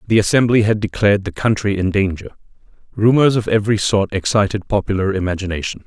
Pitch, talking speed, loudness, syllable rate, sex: 100 Hz, 155 wpm, -17 LUFS, 6.2 syllables/s, male